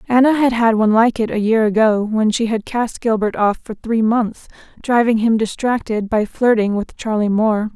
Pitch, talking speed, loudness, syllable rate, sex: 225 Hz, 200 wpm, -17 LUFS, 5.0 syllables/s, female